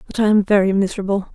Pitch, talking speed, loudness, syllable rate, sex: 200 Hz, 225 wpm, -17 LUFS, 7.7 syllables/s, female